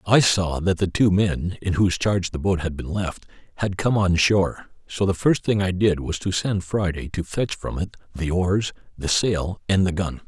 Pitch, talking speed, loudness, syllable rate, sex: 95 Hz, 230 wpm, -22 LUFS, 4.8 syllables/s, male